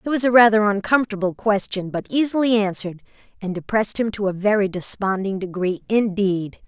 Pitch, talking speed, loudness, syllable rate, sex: 205 Hz, 160 wpm, -20 LUFS, 5.7 syllables/s, female